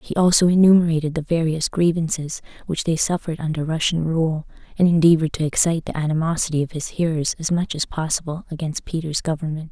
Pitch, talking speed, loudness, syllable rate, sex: 160 Hz, 175 wpm, -20 LUFS, 6.2 syllables/s, female